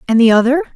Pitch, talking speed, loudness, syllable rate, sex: 255 Hz, 240 wpm, -12 LUFS, 8.0 syllables/s, female